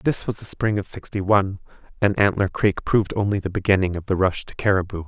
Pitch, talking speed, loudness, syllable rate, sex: 95 Hz, 225 wpm, -22 LUFS, 6.1 syllables/s, male